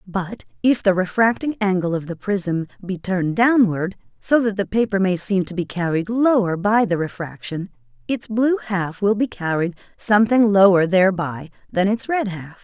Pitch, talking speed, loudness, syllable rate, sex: 195 Hz, 175 wpm, -20 LUFS, 4.8 syllables/s, female